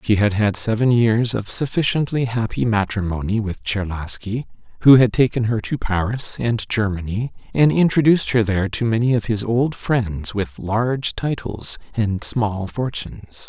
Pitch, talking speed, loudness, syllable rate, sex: 110 Hz, 155 wpm, -20 LUFS, 4.6 syllables/s, male